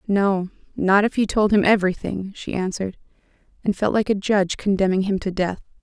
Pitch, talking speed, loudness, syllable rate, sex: 195 Hz, 185 wpm, -21 LUFS, 5.7 syllables/s, female